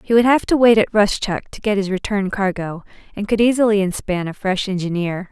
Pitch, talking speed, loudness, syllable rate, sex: 200 Hz, 215 wpm, -18 LUFS, 5.5 syllables/s, female